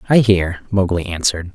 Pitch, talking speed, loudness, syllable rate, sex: 95 Hz, 155 wpm, -17 LUFS, 5.5 syllables/s, male